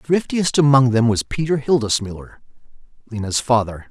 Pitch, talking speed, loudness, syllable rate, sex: 125 Hz, 125 wpm, -18 LUFS, 5.4 syllables/s, male